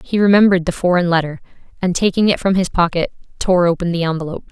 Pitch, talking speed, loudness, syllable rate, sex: 180 Hz, 200 wpm, -16 LUFS, 6.9 syllables/s, female